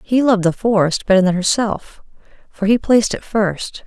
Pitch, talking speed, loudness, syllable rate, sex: 205 Hz, 185 wpm, -16 LUFS, 5.1 syllables/s, female